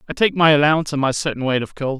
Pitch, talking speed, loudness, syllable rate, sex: 145 Hz, 300 wpm, -18 LUFS, 8.1 syllables/s, male